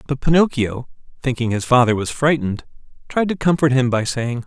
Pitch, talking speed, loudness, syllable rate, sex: 135 Hz, 175 wpm, -18 LUFS, 5.6 syllables/s, male